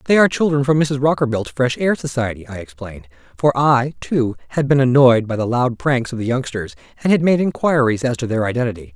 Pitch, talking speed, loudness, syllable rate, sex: 130 Hz, 215 wpm, -17 LUFS, 5.9 syllables/s, male